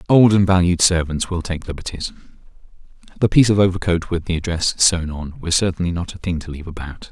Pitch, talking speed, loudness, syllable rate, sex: 90 Hz, 200 wpm, -18 LUFS, 6.2 syllables/s, male